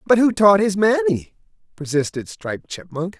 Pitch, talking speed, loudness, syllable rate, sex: 170 Hz, 150 wpm, -19 LUFS, 5.7 syllables/s, male